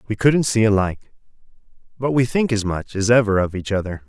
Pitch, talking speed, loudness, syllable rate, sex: 110 Hz, 205 wpm, -19 LUFS, 6.0 syllables/s, male